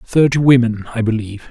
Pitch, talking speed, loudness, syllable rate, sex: 120 Hz, 160 wpm, -15 LUFS, 6.1 syllables/s, male